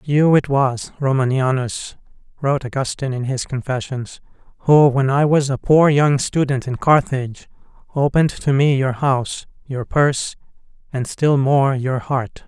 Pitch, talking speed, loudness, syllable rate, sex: 135 Hz, 150 wpm, -18 LUFS, 4.6 syllables/s, male